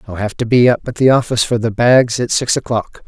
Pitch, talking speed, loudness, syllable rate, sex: 120 Hz, 275 wpm, -14 LUFS, 5.9 syllables/s, male